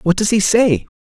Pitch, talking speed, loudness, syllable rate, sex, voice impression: 195 Hz, 235 wpm, -15 LUFS, 4.7 syllables/s, male, masculine, adult-like, tensed, slightly weak, bright, soft, clear, cool, intellectual, sincere, calm, friendly, reassuring, wild, slightly lively, kind